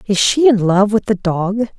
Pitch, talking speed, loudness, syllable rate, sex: 210 Hz, 235 wpm, -14 LUFS, 4.4 syllables/s, female